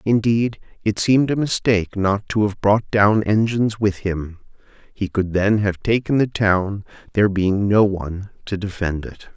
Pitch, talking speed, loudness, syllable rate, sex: 105 Hz, 175 wpm, -19 LUFS, 4.6 syllables/s, male